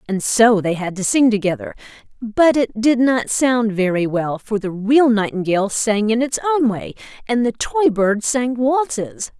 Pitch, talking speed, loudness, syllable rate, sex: 225 Hz, 185 wpm, -17 LUFS, 4.4 syllables/s, female